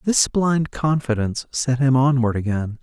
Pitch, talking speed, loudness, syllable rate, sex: 130 Hz, 150 wpm, -20 LUFS, 4.5 syllables/s, male